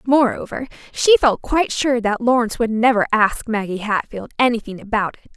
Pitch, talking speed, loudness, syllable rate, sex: 230 Hz, 170 wpm, -18 LUFS, 5.4 syllables/s, female